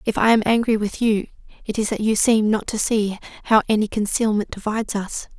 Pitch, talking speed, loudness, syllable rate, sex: 215 Hz, 210 wpm, -20 LUFS, 5.6 syllables/s, female